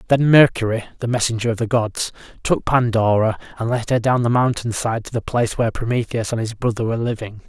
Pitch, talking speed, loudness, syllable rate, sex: 115 Hz, 210 wpm, -19 LUFS, 6.1 syllables/s, male